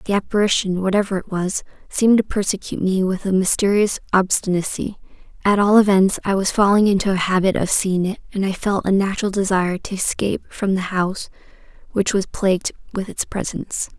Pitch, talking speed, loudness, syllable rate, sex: 195 Hz, 180 wpm, -19 LUFS, 5.9 syllables/s, female